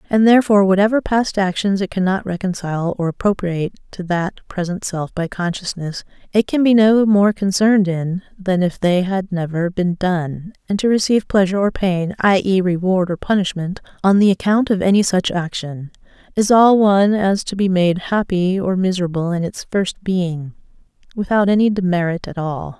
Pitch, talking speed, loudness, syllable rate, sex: 190 Hz, 175 wpm, -17 LUFS, 5.2 syllables/s, female